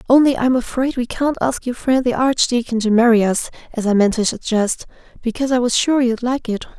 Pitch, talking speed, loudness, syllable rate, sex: 245 Hz, 220 wpm, -18 LUFS, 5.6 syllables/s, female